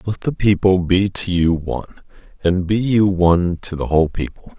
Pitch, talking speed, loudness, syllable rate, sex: 90 Hz, 195 wpm, -18 LUFS, 4.9 syllables/s, male